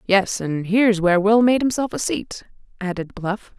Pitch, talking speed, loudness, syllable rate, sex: 205 Hz, 185 wpm, -20 LUFS, 4.8 syllables/s, female